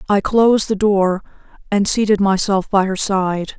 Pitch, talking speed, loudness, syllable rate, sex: 200 Hz, 165 wpm, -16 LUFS, 4.4 syllables/s, female